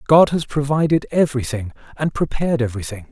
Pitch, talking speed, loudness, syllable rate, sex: 140 Hz, 175 wpm, -19 LUFS, 6.3 syllables/s, male